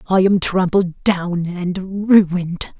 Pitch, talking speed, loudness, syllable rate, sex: 185 Hz, 130 wpm, -17 LUFS, 3.1 syllables/s, female